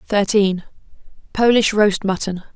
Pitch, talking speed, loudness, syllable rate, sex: 205 Hz, 70 wpm, -17 LUFS, 4.1 syllables/s, female